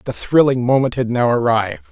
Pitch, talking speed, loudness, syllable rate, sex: 125 Hz, 190 wpm, -16 LUFS, 5.9 syllables/s, male